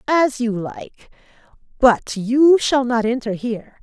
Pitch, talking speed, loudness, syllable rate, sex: 240 Hz, 140 wpm, -18 LUFS, 3.7 syllables/s, female